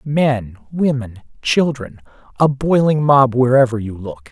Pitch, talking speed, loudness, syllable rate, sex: 125 Hz, 125 wpm, -16 LUFS, 4.0 syllables/s, male